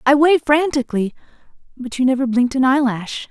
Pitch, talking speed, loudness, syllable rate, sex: 265 Hz, 165 wpm, -17 LUFS, 6.3 syllables/s, female